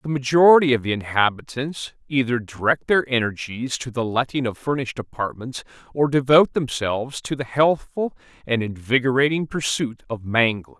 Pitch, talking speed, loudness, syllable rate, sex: 130 Hz, 145 wpm, -21 LUFS, 5.2 syllables/s, male